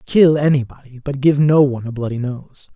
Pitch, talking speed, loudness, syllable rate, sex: 135 Hz, 195 wpm, -16 LUFS, 5.4 syllables/s, male